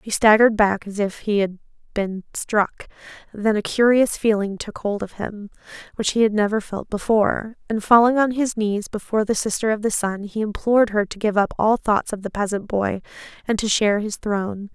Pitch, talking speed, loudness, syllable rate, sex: 210 Hz, 205 wpm, -21 LUFS, 5.3 syllables/s, female